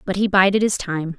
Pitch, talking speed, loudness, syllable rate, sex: 190 Hz, 255 wpm, -18 LUFS, 5.5 syllables/s, female